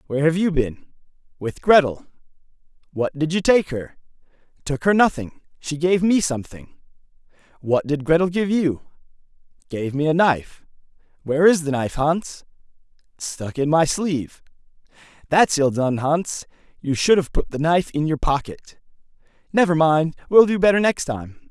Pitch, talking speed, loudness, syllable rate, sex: 155 Hz, 155 wpm, -20 LUFS, 4.9 syllables/s, male